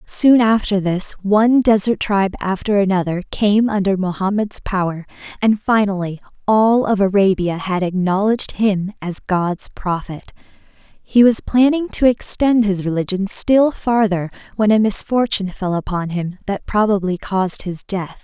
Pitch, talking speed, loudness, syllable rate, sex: 200 Hz, 140 wpm, -17 LUFS, 4.6 syllables/s, female